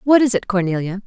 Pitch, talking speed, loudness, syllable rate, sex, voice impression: 210 Hz, 225 wpm, -18 LUFS, 6.3 syllables/s, female, feminine, slightly adult-like, slightly tensed, slightly refreshing, slightly sincere, slightly elegant